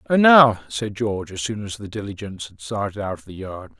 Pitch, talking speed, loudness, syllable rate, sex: 105 Hz, 235 wpm, -20 LUFS, 5.7 syllables/s, male